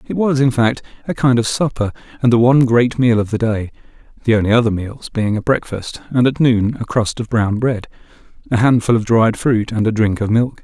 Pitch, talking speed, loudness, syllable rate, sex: 115 Hz, 225 wpm, -16 LUFS, 5.3 syllables/s, male